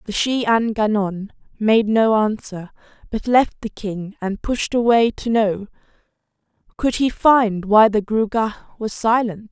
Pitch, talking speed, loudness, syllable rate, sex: 215 Hz, 150 wpm, -19 LUFS, 3.9 syllables/s, female